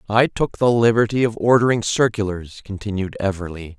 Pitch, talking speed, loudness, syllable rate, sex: 105 Hz, 145 wpm, -19 LUFS, 5.4 syllables/s, male